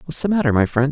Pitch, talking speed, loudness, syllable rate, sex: 145 Hz, 330 wpm, -18 LUFS, 7.3 syllables/s, male